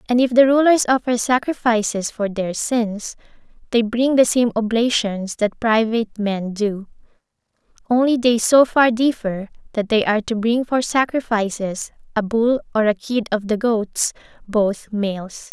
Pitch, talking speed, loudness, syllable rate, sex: 225 Hz, 155 wpm, -19 LUFS, 4.4 syllables/s, female